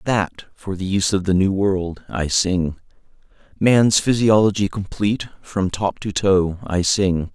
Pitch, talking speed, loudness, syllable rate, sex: 95 Hz, 155 wpm, -19 LUFS, 4.1 syllables/s, male